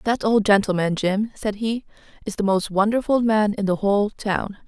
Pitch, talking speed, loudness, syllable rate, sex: 210 Hz, 195 wpm, -21 LUFS, 4.9 syllables/s, female